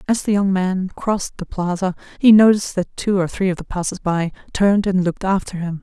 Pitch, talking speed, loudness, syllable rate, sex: 190 Hz, 225 wpm, -19 LUFS, 5.8 syllables/s, female